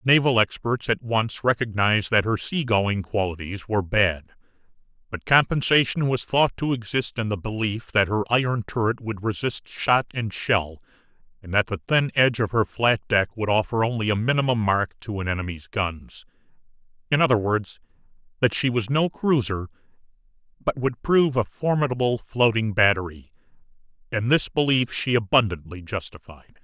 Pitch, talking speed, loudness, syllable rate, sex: 110 Hz, 160 wpm, -23 LUFS, 5.0 syllables/s, male